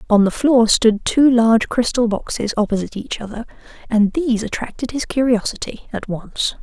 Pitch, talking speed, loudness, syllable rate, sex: 230 Hz, 165 wpm, -18 LUFS, 5.2 syllables/s, female